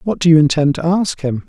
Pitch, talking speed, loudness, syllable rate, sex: 160 Hz, 285 wpm, -14 LUFS, 5.8 syllables/s, male